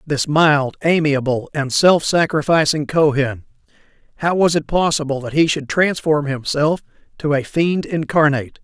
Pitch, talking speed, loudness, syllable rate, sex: 150 Hz, 140 wpm, -17 LUFS, 4.6 syllables/s, male